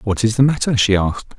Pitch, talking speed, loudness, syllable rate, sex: 110 Hz, 260 wpm, -16 LUFS, 6.7 syllables/s, male